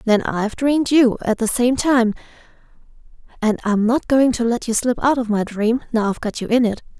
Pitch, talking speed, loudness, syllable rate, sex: 235 Hz, 225 wpm, -18 LUFS, 5.5 syllables/s, female